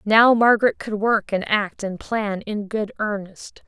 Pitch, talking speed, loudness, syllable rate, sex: 210 Hz, 180 wpm, -21 LUFS, 4.0 syllables/s, female